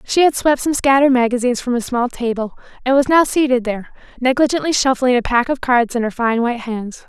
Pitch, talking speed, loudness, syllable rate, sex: 250 Hz, 220 wpm, -16 LUFS, 6.1 syllables/s, female